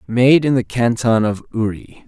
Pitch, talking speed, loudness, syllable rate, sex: 115 Hz, 175 wpm, -16 LUFS, 4.4 syllables/s, male